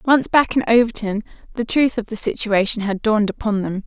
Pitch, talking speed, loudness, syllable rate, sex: 220 Hz, 200 wpm, -19 LUFS, 5.6 syllables/s, female